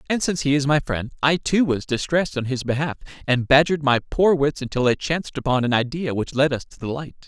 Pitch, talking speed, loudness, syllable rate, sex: 140 Hz, 250 wpm, -21 LUFS, 6.1 syllables/s, male